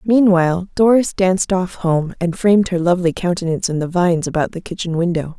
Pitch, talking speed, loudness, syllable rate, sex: 180 Hz, 190 wpm, -17 LUFS, 6.0 syllables/s, female